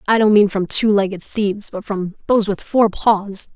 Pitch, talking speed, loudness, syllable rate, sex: 205 Hz, 220 wpm, -17 LUFS, 4.9 syllables/s, female